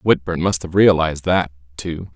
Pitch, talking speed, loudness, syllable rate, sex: 85 Hz, 165 wpm, -18 LUFS, 4.9 syllables/s, male